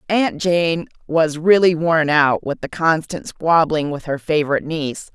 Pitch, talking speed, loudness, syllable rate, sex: 160 Hz, 165 wpm, -18 LUFS, 4.4 syllables/s, female